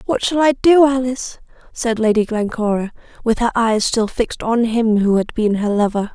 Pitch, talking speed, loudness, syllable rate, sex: 230 Hz, 195 wpm, -17 LUFS, 5.0 syllables/s, female